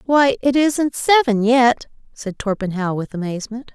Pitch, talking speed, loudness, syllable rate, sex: 240 Hz, 145 wpm, -18 LUFS, 4.5 syllables/s, female